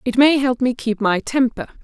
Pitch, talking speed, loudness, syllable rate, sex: 250 Hz, 230 wpm, -18 LUFS, 5.0 syllables/s, female